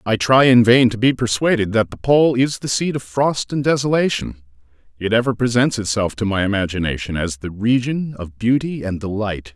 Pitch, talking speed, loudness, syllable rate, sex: 115 Hz, 195 wpm, -18 LUFS, 5.3 syllables/s, male